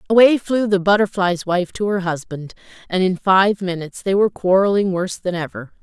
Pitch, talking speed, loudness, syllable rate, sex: 190 Hz, 185 wpm, -18 LUFS, 5.5 syllables/s, female